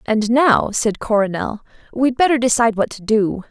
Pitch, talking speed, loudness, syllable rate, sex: 225 Hz, 170 wpm, -17 LUFS, 4.9 syllables/s, female